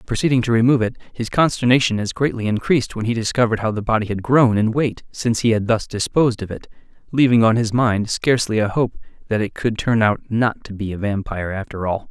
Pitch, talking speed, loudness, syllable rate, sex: 115 Hz, 225 wpm, -19 LUFS, 6.3 syllables/s, male